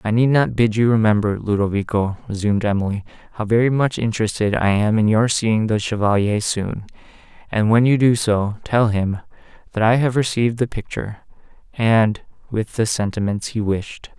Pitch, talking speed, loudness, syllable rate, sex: 110 Hz, 170 wpm, -19 LUFS, 5.2 syllables/s, male